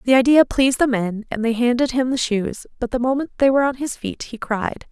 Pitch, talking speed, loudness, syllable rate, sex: 250 Hz, 255 wpm, -19 LUFS, 5.7 syllables/s, female